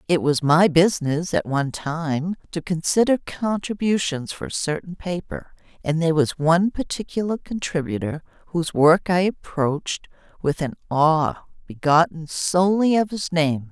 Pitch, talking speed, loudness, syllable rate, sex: 165 Hz, 140 wpm, -22 LUFS, 4.7 syllables/s, female